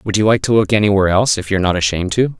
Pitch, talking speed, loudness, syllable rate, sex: 100 Hz, 300 wpm, -15 LUFS, 8.1 syllables/s, male